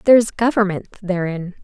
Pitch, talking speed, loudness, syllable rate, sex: 200 Hz, 145 wpm, -19 LUFS, 5.8 syllables/s, female